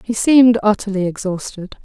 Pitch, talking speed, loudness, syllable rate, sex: 210 Hz, 130 wpm, -15 LUFS, 5.5 syllables/s, female